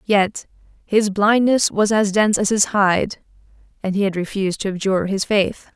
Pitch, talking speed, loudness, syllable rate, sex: 200 Hz, 175 wpm, -18 LUFS, 4.9 syllables/s, female